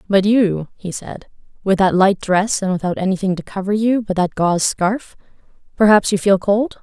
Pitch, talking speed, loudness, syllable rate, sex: 195 Hz, 195 wpm, -17 LUFS, 5.0 syllables/s, female